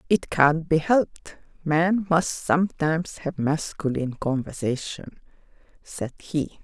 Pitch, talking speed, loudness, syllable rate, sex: 160 Hz, 110 wpm, -24 LUFS, 4.0 syllables/s, female